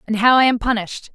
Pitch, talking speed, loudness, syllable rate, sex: 230 Hz, 265 wpm, -16 LUFS, 6.9 syllables/s, female